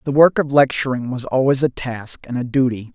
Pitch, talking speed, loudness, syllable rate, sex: 130 Hz, 225 wpm, -18 LUFS, 5.3 syllables/s, male